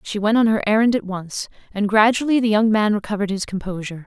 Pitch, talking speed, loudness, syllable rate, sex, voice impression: 210 Hz, 220 wpm, -19 LUFS, 6.5 syllables/s, female, feminine, slightly adult-like, powerful, fluent, slightly intellectual, slightly sharp